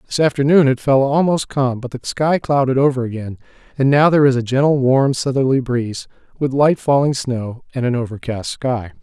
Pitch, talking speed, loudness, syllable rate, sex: 130 Hz, 195 wpm, -17 LUFS, 5.4 syllables/s, male